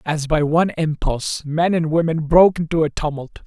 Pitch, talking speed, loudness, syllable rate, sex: 155 Hz, 190 wpm, -18 LUFS, 5.4 syllables/s, male